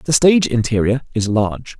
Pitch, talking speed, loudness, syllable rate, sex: 120 Hz, 165 wpm, -16 LUFS, 5.7 syllables/s, male